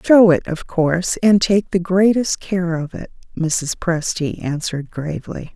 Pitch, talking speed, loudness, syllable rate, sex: 175 Hz, 160 wpm, -18 LUFS, 4.3 syllables/s, female